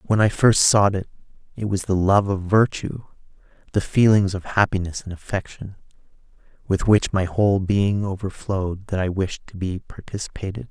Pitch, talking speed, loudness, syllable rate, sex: 100 Hz, 160 wpm, -21 LUFS, 5.0 syllables/s, male